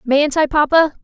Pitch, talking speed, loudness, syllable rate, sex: 295 Hz, 175 wpm, -15 LUFS, 4.7 syllables/s, female